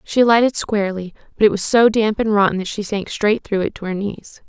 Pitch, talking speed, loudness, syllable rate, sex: 210 Hz, 255 wpm, -18 LUFS, 5.8 syllables/s, female